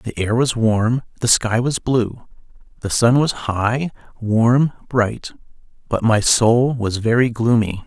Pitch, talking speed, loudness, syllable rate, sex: 115 Hz, 155 wpm, -18 LUFS, 3.6 syllables/s, male